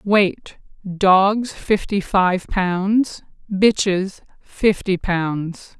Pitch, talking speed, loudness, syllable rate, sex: 195 Hz, 70 wpm, -19 LUFS, 2.2 syllables/s, female